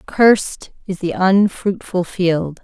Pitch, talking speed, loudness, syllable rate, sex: 185 Hz, 115 wpm, -17 LUFS, 3.4 syllables/s, female